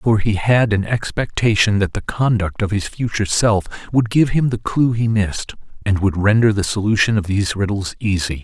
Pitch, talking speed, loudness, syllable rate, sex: 105 Hz, 200 wpm, -18 LUFS, 5.3 syllables/s, male